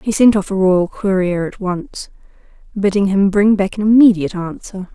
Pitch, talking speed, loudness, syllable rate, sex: 195 Hz, 180 wpm, -15 LUFS, 4.9 syllables/s, female